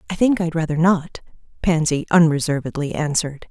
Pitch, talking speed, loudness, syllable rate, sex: 160 Hz, 135 wpm, -19 LUFS, 5.7 syllables/s, female